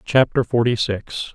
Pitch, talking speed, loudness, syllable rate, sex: 115 Hz, 135 wpm, -20 LUFS, 4.0 syllables/s, male